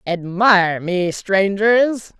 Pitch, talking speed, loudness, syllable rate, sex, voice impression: 195 Hz, 80 wpm, -16 LUFS, 2.9 syllables/s, female, feminine, adult-like, powerful, slightly fluent, unique, intense, slightly sharp